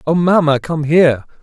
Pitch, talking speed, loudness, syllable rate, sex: 155 Hz, 170 wpm, -14 LUFS, 5.2 syllables/s, male